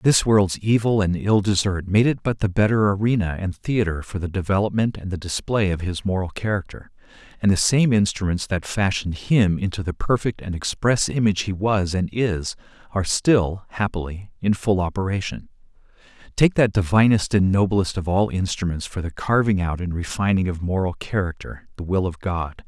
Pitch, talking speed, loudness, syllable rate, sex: 95 Hz, 180 wpm, -21 LUFS, 5.2 syllables/s, male